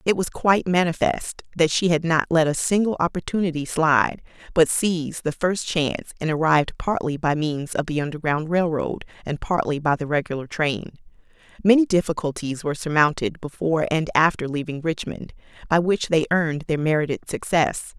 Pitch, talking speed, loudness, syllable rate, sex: 160 Hz, 165 wpm, -22 LUFS, 5.4 syllables/s, female